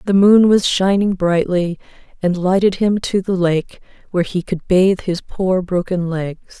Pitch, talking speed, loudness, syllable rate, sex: 185 Hz, 175 wpm, -16 LUFS, 4.4 syllables/s, female